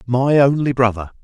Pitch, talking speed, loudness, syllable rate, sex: 125 Hz, 145 wpm, -16 LUFS, 4.8 syllables/s, male